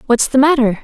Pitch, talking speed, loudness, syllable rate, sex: 255 Hz, 215 wpm, -13 LUFS, 6.0 syllables/s, female